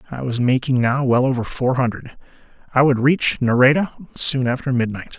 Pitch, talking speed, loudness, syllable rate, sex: 130 Hz, 175 wpm, -18 LUFS, 5.3 syllables/s, male